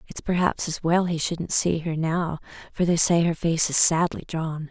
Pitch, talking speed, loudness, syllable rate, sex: 165 Hz, 215 wpm, -22 LUFS, 4.5 syllables/s, female